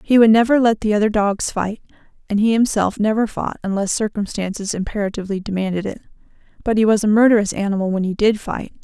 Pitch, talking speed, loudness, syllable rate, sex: 210 Hz, 190 wpm, -18 LUFS, 6.2 syllables/s, female